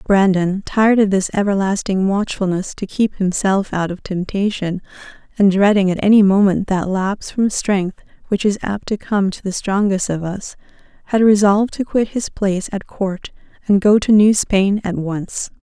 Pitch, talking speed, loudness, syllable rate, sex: 195 Hz, 175 wpm, -17 LUFS, 4.7 syllables/s, female